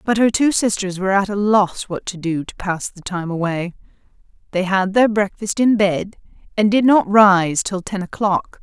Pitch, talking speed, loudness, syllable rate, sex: 195 Hz, 200 wpm, -18 LUFS, 4.6 syllables/s, female